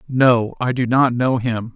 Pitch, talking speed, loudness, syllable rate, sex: 120 Hz, 205 wpm, -18 LUFS, 4.0 syllables/s, male